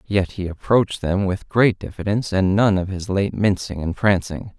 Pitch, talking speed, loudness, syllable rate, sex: 95 Hz, 195 wpm, -20 LUFS, 4.9 syllables/s, male